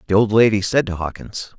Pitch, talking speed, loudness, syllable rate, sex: 105 Hz, 230 wpm, -18 LUFS, 6.0 syllables/s, male